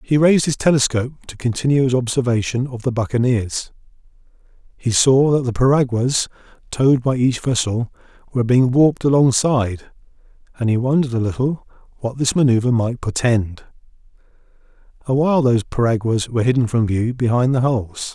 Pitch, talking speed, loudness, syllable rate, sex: 125 Hz, 145 wpm, -18 LUFS, 5.6 syllables/s, male